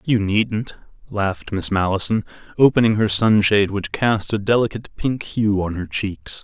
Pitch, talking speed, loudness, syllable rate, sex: 105 Hz, 160 wpm, -19 LUFS, 4.8 syllables/s, male